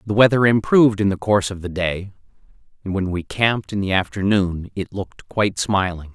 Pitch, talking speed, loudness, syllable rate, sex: 100 Hz, 195 wpm, -19 LUFS, 5.7 syllables/s, male